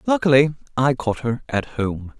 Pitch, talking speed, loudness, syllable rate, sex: 135 Hz, 165 wpm, -20 LUFS, 4.5 syllables/s, female